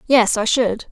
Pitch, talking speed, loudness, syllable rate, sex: 230 Hz, 195 wpm, -17 LUFS, 4.0 syllables/s, female